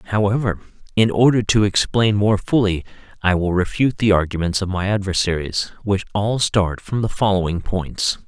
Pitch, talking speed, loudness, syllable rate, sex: 100 Hz, 160 wpm, -19 LUFS, 5.1 syllables/s, male